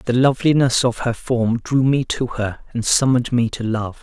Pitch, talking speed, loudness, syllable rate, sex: 125 Hz, 210 wpm, -19 LUFS, 4.9 syllables/s, male